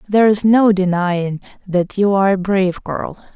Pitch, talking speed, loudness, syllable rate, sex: 190 Hz, 160 wpm, -16 LUFS, 4.5 syllables/s, female